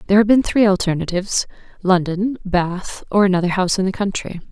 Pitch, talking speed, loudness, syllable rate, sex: 190 Hz, 175 wpm, -18 LUFS, 6.1 syllables/s, female